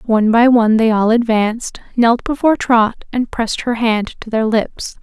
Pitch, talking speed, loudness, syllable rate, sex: 230 Hz, 190 wpm, -15 LUFS, 5.1 syllables/s, female